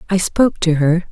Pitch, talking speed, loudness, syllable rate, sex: 175 Hz, 215 wpm, -16 LUFS, 5.6 syllables/s, female